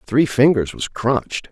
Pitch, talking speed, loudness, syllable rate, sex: 130 Hz, 160 wpm, -18 LUFS, 4.4 syllables/s, male